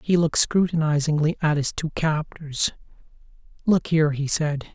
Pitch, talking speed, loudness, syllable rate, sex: 155 Hz, 140 wpm, -22 LUFS, 5.0 syllables/s, male